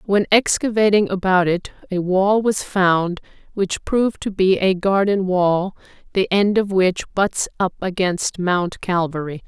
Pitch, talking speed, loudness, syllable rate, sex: 190 Hz, 150 wpm, -19 LUFS, 4.1 syllables/s, female